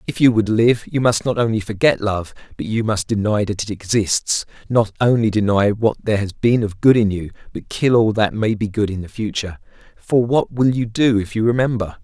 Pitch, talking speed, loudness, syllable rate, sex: 110 Hz, 230 wpm, -18 LUFS, 5.3 syllables/s, male